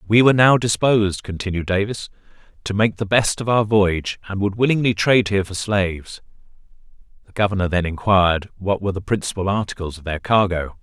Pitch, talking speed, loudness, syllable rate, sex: 100 Hz, 175 wpm, -19 LUFS, 6.1 syllables/s, male